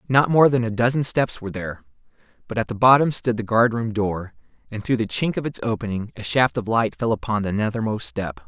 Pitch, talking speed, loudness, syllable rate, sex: 115 Hz, 225 wpm, -21 LUFS, 5.8 syllables/s, male